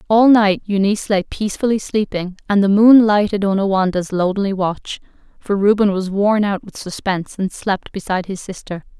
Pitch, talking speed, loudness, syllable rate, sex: 200 Hz, 165 wpm, -17 LUFS, 5.3 syllables/s, female